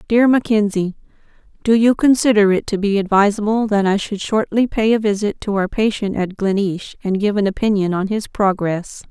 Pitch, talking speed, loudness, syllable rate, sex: 205 Hz, 185 wpm, -17 LUFS, 5.2 syllables/s, female